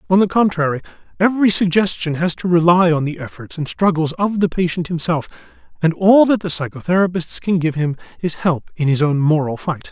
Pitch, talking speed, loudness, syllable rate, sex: 170 Hz, 195 wpm, -17 LUFS, 5.6 syllables/s, male